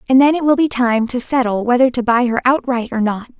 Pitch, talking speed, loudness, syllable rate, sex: 245 Hz, 265 wpm, -15 LUFS, 5.8 syllables/s, female